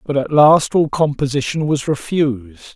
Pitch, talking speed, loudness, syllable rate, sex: 140 Hz, 155 wpm, -16 LUFS, 4.7 syllables/s, male